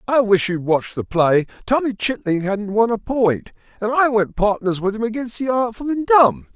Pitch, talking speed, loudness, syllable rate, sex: 210 Hz, 220 wpm, -19 LUFS, 5.1 syllables/s, male